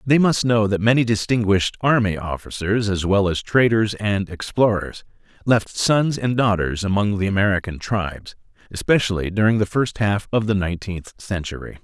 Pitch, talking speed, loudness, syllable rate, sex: 105 Hz, 155 wpm, -20 LUFS, 5.1 syllables/s, male